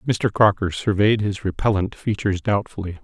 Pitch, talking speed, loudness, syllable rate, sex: 105 Hz, 140 wpm, -21 LUFS, 5.4 syllables/s, male